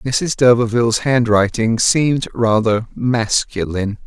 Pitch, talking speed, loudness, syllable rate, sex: 115 Hz, 90 wpm, -16 LUFS, 4.1 syllables/s, male